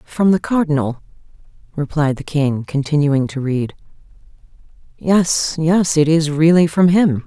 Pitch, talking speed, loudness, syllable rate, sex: 155 Hz, 130 wpm, -16 LUFS, 4.2 syllables/s, female